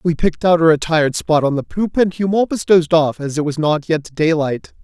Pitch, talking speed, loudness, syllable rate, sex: 165 Hz, 235 wpm, -16 LUFS, 5.5 syllables/s, male